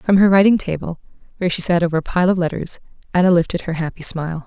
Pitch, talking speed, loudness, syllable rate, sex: 175 Hz, 230 wpm, -18 LUFS, 7.0 syllables/s, female